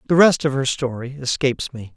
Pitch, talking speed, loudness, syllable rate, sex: 135 Hz, 215 wpm, -20 LUFS, 5.8 syllables/s, male